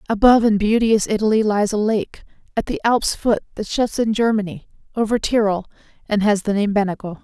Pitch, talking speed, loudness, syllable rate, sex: 210 Hz, 180 wpm, -19 LUFS, 5.6 syllables/s, female